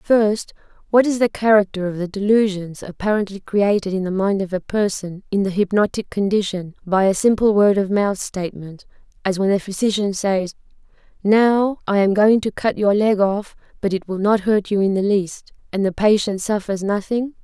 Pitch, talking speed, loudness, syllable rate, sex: 200 Hz, 190 wpm, -19 LUFS, 5.0 syllables/s, female